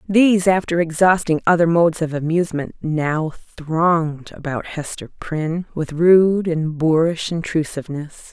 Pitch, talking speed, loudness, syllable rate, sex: 165 Hz, 125 wpm, -19 LUFS, 4.6 syllables/s, female